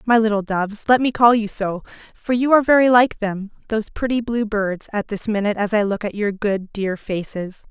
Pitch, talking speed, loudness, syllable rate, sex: 215 Hz, 220 wpm, -19 LUFS, 5.5 syllables/s, female